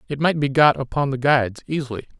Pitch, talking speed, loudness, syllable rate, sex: 135 Hz, 190 wpm, -20 LUFS, 6.4 syllables/s, male